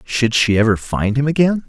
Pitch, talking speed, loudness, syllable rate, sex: 125 Hz, 215 wpm, -16 LUFS, 5.1 syllables/s, male